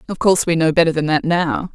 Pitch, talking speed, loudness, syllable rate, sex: 165 Hz, 275 wpm, -16 LUFS, 6.3 syllables/s, female